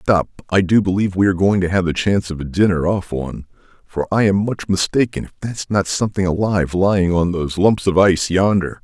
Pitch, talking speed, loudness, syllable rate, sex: 95 Hz, 230 wpm, -17 LUFS, 6.3 syllables/s, male